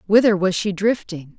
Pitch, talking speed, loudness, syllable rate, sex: 195 Hz, 175 wpm, -19 LUFS, 4.9 syllables/s, female